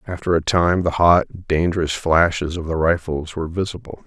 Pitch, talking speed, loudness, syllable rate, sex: 85 Hz, 175 wpm, -19 LUFS, 5.1 syllables/s, male